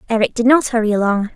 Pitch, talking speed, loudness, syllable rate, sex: 225 Hz, 220 wpm, -16 LUFS, 6.8 syllables/s, female